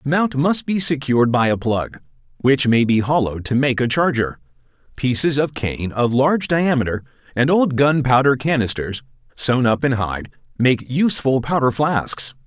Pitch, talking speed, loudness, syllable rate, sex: 130 Hz, 165 wpm, -18 LUFS, 4.8 syllables/s, male